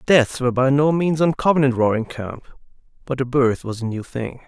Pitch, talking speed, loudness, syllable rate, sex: 130 Hz, 215 wpm, -20 LUFS, 5.4 syllables/s, male